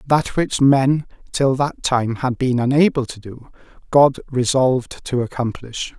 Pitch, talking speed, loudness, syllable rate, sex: 130 Hz, 150 wpm, -18 LUFS, 4.1 syllables/s, male